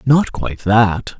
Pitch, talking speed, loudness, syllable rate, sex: 110 Hz, 150 wpm, -16 LUFS, 3.7 syllables/s, male